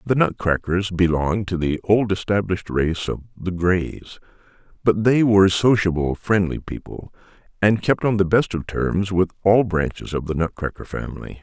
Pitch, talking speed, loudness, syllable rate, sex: 95 Hz, 165 wpm, -20 LUFS, 4.9 syllables/s, male